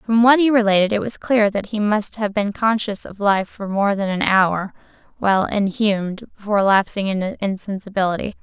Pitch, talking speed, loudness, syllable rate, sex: 205 Hz, 185 wpm, -19 LUFS, 5.3 syllables/s, female